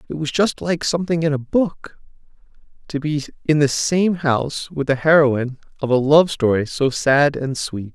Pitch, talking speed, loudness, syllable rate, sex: 145 Hz, 190 wpm, -19 LUFS, 4.8 syllables/s, male